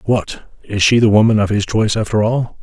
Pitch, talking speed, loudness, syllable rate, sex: 105 Hz, 205 wpm, -15 LUFS, 5.5 syllables/s, male